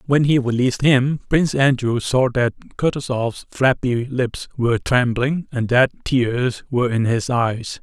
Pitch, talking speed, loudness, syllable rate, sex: 125 Hz, 155 wpm, -19 LUFS, 4.3 syllables/s, male